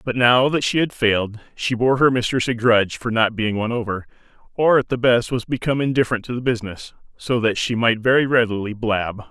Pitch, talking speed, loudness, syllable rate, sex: 120 Hz, 220 wpm, -19 LUFS, 5.7 syllables/s, male